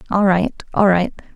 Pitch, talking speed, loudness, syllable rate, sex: 190 Hz, 175 wpm, -17 LUFS, 4.4 syllables/s, female